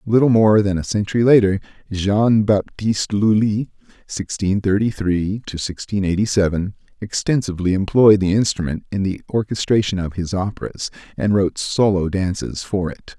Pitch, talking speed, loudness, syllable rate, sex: 100 Hz, 145 wpm, -19 LUFS, 4.3 syllables/s, male